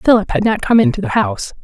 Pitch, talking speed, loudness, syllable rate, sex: 210 Hz, 255 wpm, -15 LUFS, 6.6 syllables/s, female